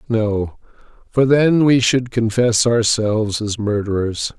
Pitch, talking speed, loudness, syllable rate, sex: 115 Hz, 125 wpm, -17 LUFS, 3.8 syllables/s, male